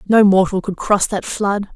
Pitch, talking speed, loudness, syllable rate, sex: 200 Hz, 205 wpm, -16 LUFS, 4.6 syllables/s, female